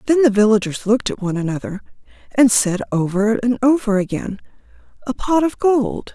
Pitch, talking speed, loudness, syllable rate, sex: 225 Hz, 165 wpm, -18 LUFS, 5.6 syllables/s, female